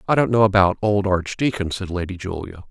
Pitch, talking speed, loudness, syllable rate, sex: 100 Hz, 200 wpm, -20 LUFS, 5.7 syllables/s, male